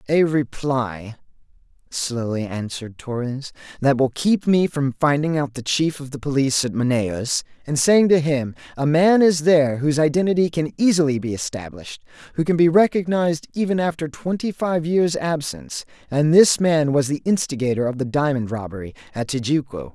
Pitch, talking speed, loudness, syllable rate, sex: 145 Hz, 165 wpm, -20 LUFS, 5.2 syllables/s, male